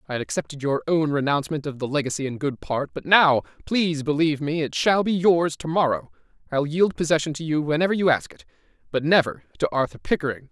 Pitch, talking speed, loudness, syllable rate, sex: 145 Hz, 205 wpm, -23 LUFS, 6.2 syllables/s, male